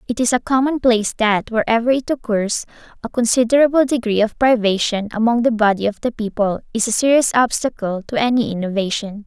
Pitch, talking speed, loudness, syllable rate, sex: 230 Hz, 170 wpm, -17 LUFS, 5.8 syllables/s, female